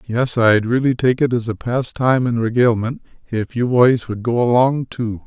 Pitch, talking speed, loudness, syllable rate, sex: 120 Hz, 195 wpm, -17 LUFS, 5.0 syllables/s, male